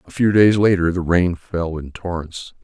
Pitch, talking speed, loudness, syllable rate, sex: 90 Hz, 205 wpm, -18 LUFS, 4.5 syllables/s, male